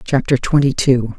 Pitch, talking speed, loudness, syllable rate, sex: 130 Hz, 150 wpm, -15 LUFS, 4.6 syllables/s, female